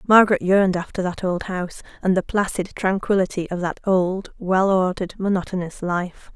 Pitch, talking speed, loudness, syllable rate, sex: 185 Hz, 160 wpm, -21 LUFS, 5.3 syllables/s, female